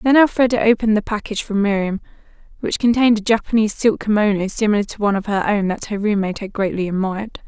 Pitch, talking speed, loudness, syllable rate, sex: 210 Hz, 200 wpm, -18 LUFS, 7.0 syllables/s, female